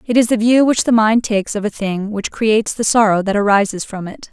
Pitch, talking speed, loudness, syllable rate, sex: 215 Hz, 265 wpm, -15 LUFS, 5.7 syllables/s, female